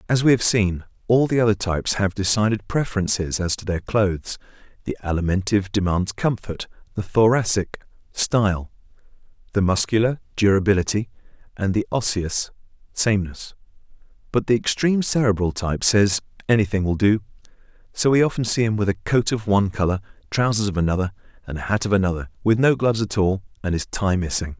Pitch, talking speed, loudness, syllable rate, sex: 100 Hz, 155 wpm, -21 LUFS, 5.9 syllables/s, male